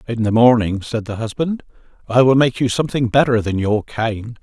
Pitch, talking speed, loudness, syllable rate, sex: 115 Hz, 205 wpm, -17 LUFS, 5.2 syllables/s, male